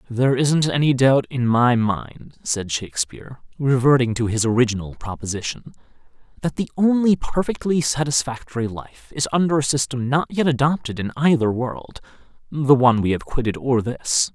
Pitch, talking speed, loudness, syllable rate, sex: 130 Hz, 150 wpm, -20 LUFS, 5.1 syllables/s, male